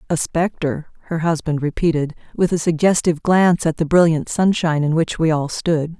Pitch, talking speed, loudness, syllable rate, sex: 160 Hz, 180 wpm, -18 LUFS, 5.3 syllables/s, female